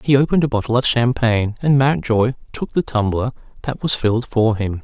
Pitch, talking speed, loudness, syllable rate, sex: 120 Hz, 200 wpm, -18 LUFS, 5.5 syllables/s, male